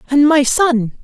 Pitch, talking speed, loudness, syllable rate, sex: 280 Hz, 175 wpm, -13 LUFS, 3.8 syllables/s, female